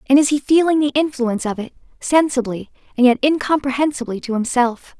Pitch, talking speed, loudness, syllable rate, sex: 265 Hz, 170 wpm, -18 LUFS, 5.9 syllables/s, female